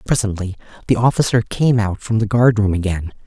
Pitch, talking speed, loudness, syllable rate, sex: 105 Hz, 185 wpm, -17 LUFS, 5.8 syllables/s, male